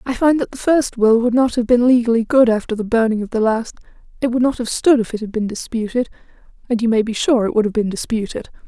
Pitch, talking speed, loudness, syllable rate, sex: 235 Hz, 265 wpm, -17 LUFS, 6.2 syllables/s, female